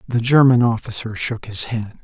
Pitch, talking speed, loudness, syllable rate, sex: 115 Hz, 175 wpm, -18 LUFS, 5.0 syllables/s, male